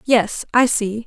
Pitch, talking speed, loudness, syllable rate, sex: 230 Hz, 170 wpm, -18 LUFS, 3.3 syllables/s, female